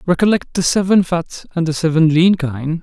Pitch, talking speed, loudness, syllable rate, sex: 170 Hz, 190 wpm, -16 LUFS, 5.0 syllables/s, male